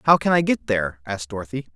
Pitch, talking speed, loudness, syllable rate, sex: 120 Hz, 240 wpm, -22 LUFS, 7.2 syllables/s, male